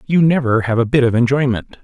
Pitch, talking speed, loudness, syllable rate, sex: 130 Hz, 230 wpm, -15 LUFS, 6.0 syllables/s, male